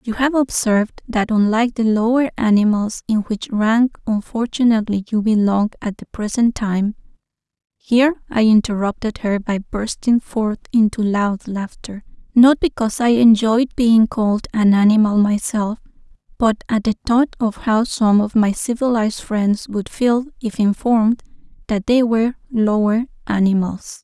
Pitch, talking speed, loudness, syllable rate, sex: 220 Hz, 140 wpm, -17 LUFS, 4.7 syllables/s, female